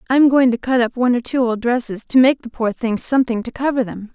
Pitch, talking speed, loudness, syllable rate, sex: 245 Hz, 290 wpm, -17 LUFS, 6.4 syllables/s, female